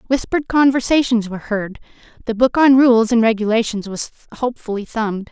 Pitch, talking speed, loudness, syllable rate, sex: 235 Hz, 145 wpm, -17 LUFS, 6.0 syllables/s, female